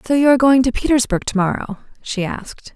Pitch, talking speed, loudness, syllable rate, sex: 240 Hz, 195 wpm, -17 LUFS, 6.2 syllables/s, female